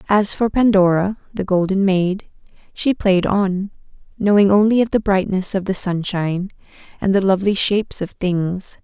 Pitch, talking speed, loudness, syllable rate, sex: 195 Hz, 150 wpm, -18 LUFS, 4.7 syllables/s, female